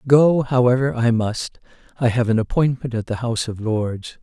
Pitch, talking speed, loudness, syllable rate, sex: 120 Hz, 185 wpm, -20 LUFS, 5.0 syllables/s, male